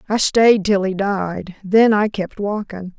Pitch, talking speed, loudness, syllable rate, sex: 200 Hz, 180 wpm, -17 LUFS, 3.7 syllables/s, female